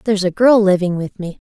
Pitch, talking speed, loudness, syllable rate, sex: 195 Hz, 245 wpm, -15 LUFS, 6.2 syllables/s, female